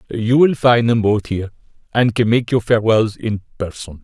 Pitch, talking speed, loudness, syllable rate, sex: 115 Hz, 195 wpm, -17 LUFS, 5.3 syllables/s, male